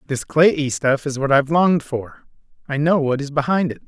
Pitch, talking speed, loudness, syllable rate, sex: 145 Hz, 200 wpm, -19 LUFS, 5.3 syllables/s, male